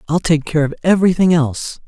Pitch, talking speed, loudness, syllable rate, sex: 160 Hz, 190 wpm, -15 LUFS, 6.4 syllables/s, male